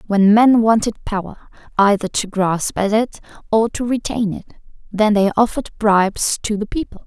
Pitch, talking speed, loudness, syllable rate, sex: 210 Hz, 170 wpm, -17 LUFS, 5.0 syllables/s, female